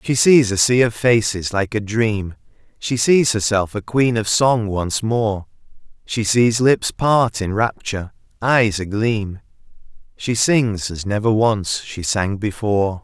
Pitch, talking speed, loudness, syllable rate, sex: 110 Hz, 155 wpm, -18 LUFS, 3.8 syllables/s, male